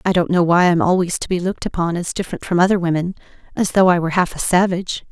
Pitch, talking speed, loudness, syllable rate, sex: 175 Hz, 245 wpm, -18 LUFS, 7.0 syllables/s, female